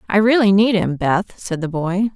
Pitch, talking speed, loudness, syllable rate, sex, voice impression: 195 Hz, 220 wpm, -17 LUFS, 4.6 syllables/s, female, very feminine, adult-like, slightly middle-aged, thin, tensed, powerful, bright, slightly soft, very clear, fluent, cool, very intellectual, very refreshing, sincere, calm, friendly, reassuring, very unique, elegant, slightly wild, sweet, very lively, strict, intense, slightly sharp, slightly light